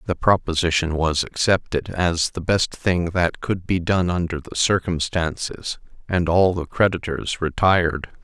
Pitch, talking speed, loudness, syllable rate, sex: 85 Hz, 145 wpm, -21 LUFS, 4.3 syllables/s, male